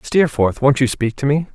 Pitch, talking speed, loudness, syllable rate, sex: 130 Hz, 235 wpm, -17 LUFS, 5.0 syllables/s, male